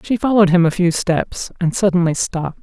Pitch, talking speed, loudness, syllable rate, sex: 180 Hz, 205 wpm, -16 LUFS, 5.7 syllables/s, female